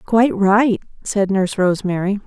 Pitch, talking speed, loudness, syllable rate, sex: 200 Hz, 130 wpm, -17 LUFS, 5.4 syllables/s, female